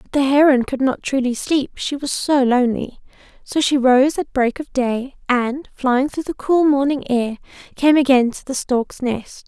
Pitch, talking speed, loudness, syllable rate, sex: 265 Hz, 195 wpm, -18 LUFS, 4.4 syllables/s, female